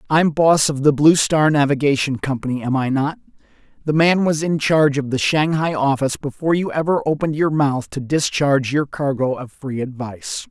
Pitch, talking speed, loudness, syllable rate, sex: 145 Hz, 190 wpm, -18 LUFS, 5.4 syllables/s, male